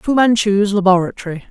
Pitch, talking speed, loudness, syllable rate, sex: 200 Hz, 120 wpm, -15 LUFS, 5.7 syllables/s, female